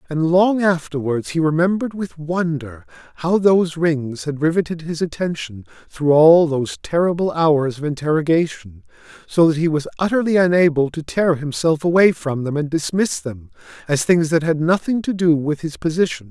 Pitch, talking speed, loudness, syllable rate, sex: 160 Hz, 170 wpm, -18 LUFS, 5.1 syllables/s, male